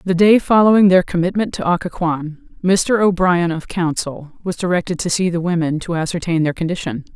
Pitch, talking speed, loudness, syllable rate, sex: 175 Hz, 175 wpm, -17 LUFS, 5.3 syllables/s, female